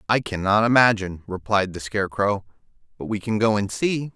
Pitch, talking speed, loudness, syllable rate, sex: 105 Hz, 175 wpm, -22 LUFS, 5.6 syllables/s, male